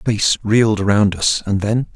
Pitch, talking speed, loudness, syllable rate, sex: 105 Hz, 185 wpm, -16 LUFS, 4.4 syllables/s, male